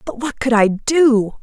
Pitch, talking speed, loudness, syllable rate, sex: 240 Hz, 210 wpm, -16 LUFS, 3.9 syllables/s, female